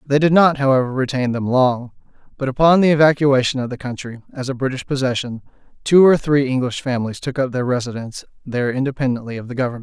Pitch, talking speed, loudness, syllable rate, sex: 130 Hz, 195 wpm, -18 LUFS, 6.5 syllables/s, male